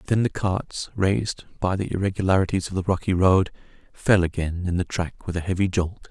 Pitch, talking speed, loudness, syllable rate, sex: 95 Hz, 195 wpm, -24 LUFS, 5.4 syllables/s, male